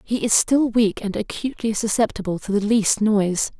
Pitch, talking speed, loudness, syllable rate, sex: 215 Hz, 185 wpm, -20 LUFS, 5.3 syllables/s, female